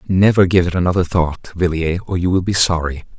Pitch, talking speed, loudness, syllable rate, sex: 90 Hz, 205 wpm, -16 LUFS, 5.7 syllables/s, male